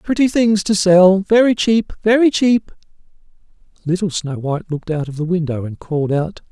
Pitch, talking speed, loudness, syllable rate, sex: 185 Hz, 175 wpm, -16 LUFS, 5.1 syllables/s, male